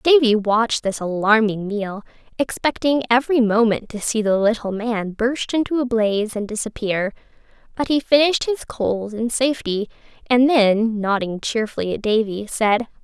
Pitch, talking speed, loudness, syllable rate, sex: 225 Hz, 150 wpm, -20 LUFS, 4.9 syllables/s, female